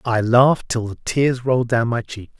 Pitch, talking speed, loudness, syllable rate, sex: 120 Hz, 225 wpm, -18 LUFS, 4.9 syllables/s, male